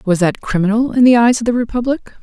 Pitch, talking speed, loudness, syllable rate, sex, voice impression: 225 Hz, 245 wpm, -14 LUFS, 6.4 syllables/s, female, very feminine, adult-like, slightly middle-aged, thin, slightly tensed, slightly weak, bright, soft, clear, fluent, cute, slightly cool, very intellectual, refreshing, sincere, calm, friendly, very reassuring, slightly unique, elegant, slightly wild, sweet, lively, very kind